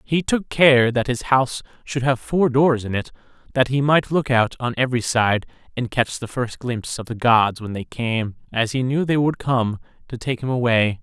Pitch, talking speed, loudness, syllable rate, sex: 125 Hz, 225 wpm, -20 LUFS, 4.8 syllables/s, male